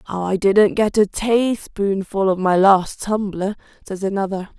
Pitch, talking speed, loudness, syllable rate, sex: 200 Hz, 145 wpm, -18 LUFS, 3.9 syllables/s, female